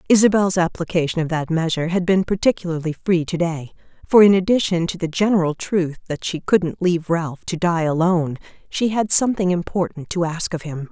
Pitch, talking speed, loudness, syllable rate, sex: 175 Hz, 185 wpm, -19 LUFS, 5.7 syllables/s, female